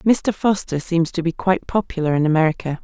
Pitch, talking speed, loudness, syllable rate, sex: 170 Hz, 190 wpm, -20 LUFS, 5.7 syllables/s, female